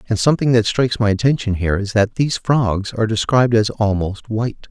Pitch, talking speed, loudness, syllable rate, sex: 110 Hz, 205 wpm, -17 LUFS, 6.2 syllables/s, male